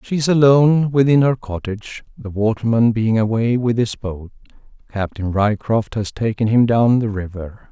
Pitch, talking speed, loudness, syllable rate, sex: 115 Hz, 165 wpm, -17 LUFS, 4.8 syllables/s, male